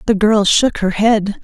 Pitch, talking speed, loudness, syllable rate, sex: 210 Hz, 210 wpm, -14 LUFS, 4.0 syllables/s, female